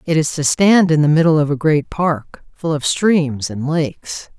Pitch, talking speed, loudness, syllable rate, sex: 155 Hz, 220 wpm, -16 LUFS, 4.4 syllables/s, female